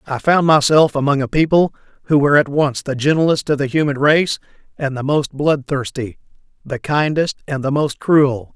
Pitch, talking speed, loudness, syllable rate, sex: 145 Hz, 180 wpm, -16 LUFS, 4.9 syllables/s, male